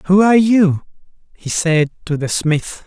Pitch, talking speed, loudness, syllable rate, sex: 175 Hz, 170 wpm, -15 LUFS, 4.5 syllables/s, male